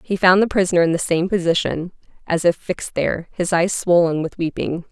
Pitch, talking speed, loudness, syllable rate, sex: 175 Hz, 210 wpm, -19 LUFS, 5.7 syllables/s, female